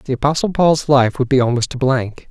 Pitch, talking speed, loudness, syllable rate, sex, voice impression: 135 Hz, 235 wpm, -16 LUFS, 5.3 syllables/s, male, masculine, adult-like, tensed, bright, clear, intellectual, calm, friendly, lively, kind, slightly light